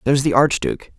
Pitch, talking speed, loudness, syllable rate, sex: 135 Hz, 185 wpm, -18 LUFS, 7.2 syllables/s, male